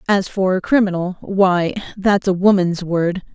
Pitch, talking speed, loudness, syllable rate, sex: 185 Hz, 125 wpm, -17 LUFS, 3.9 syllables/s, female